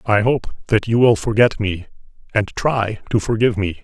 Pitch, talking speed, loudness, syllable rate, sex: 110 Hz, 190 wpm, -18 LUFS, 5.1 syllables/s, male